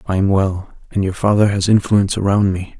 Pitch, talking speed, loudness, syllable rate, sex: 100 Hz, 215 wpm, -16 LUFS, 5.5 syllables/s, male